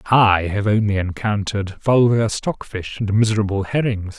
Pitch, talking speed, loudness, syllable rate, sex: 105 Hz, 130 wpm, -19 LUFS, 4.8 syllables/s, male